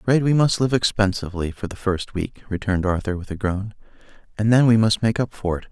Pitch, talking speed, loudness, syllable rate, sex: 105 Hz, 250 wpm, -21 LUFS, 6.5 syllables/s, male